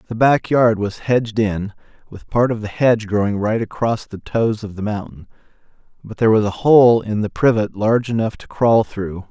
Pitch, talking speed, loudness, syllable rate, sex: 110 Hz, 205 wpm, -18 LUFS, 3.4 syllables/s, male